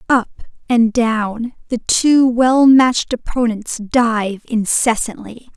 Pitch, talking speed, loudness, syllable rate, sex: 235 Hz, 110 wpm, -15 LUFS, 3.4 syllables/s, female